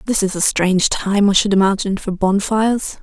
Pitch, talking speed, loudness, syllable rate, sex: 200 Hz, 200 wpm, -16 LUFS, 5.6 syllables/s, female